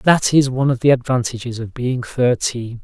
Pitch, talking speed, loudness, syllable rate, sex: 125 Hz, 190 wpm, -18 LUFS, 5.0 syllables/s, male